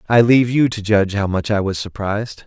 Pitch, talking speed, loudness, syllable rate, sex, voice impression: 105 Hz, 245 wpm, -17 LUFS, 6.1 syllables/s, male, masculine, adult-like, tensed, powerful, clear, fluent, cool, intellectual, calm, mature, reassuring, wild, slightly strict, slightly modest